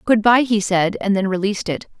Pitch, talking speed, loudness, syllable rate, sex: 205 Hz, 240 wpm, -18 LUFS, 5.5 syllables/s, female